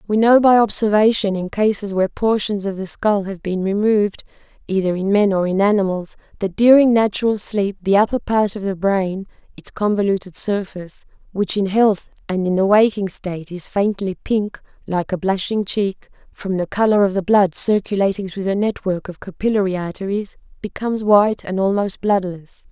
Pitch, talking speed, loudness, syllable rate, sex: 200 Hz, 170 wpm, -18 LUFS, 5.2 syllables/s, female